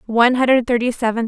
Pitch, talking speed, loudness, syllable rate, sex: 240 Hz, 190 wpm, -16 LUFS, 6.8 syllables/s, female